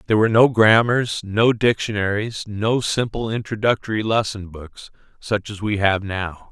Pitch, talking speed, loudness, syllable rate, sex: 105 Hz, 145 wpm, -19 LUFS, 4.6 syllables/s, male